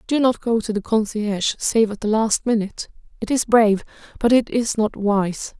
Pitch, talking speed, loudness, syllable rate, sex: 220 Hz, 205 wpm, -20 LUFS, 5.1 syllables/s, female